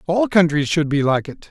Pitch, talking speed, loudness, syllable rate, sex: 160 Hz, 240 wpm, -18 LUFS, 5.1 syllables/s, male